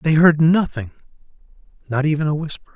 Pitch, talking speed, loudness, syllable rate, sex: 150 Hz, 150 wpm, -18 LUFS, 5.7 syllables/s, male